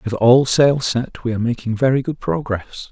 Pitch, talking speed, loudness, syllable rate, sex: 125 Hz, 205 wpm, -18 LUFS, 5.0 syllables/s, male